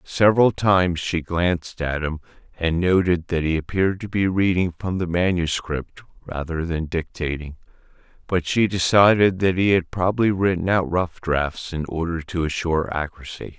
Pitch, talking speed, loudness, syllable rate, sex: 85 Hz, 160 wpm, -21 LUFS, 5.0 syllables/s, male